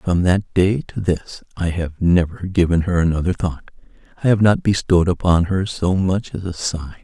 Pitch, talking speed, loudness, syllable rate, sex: 90 Hz, 195 wpm, -19 LUFS, 4.9 syllables/s, male